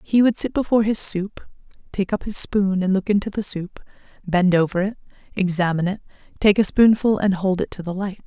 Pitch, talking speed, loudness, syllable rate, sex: 195 Hz, 210 wpm, -20 LUFS, 5.7 syllables/s, female